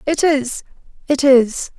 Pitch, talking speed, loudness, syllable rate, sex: 270 Hz, 100 wpm, -16 LUFS, 3.4 syllables/s, female